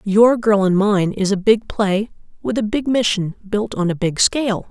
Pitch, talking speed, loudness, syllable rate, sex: 205 Hz, 215 wpm, -17 LUFS, 4.5 syllables/s, female